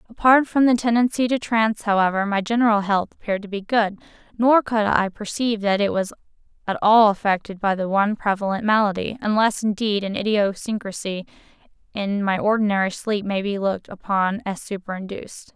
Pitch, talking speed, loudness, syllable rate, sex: 210 Hz, 160 wpm, -21 LUFS, 5.7 syllables/s, female